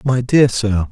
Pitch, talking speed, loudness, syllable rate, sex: 115 Hz, 200 wpm, -15 LUFS, 3.7 syllables/s, male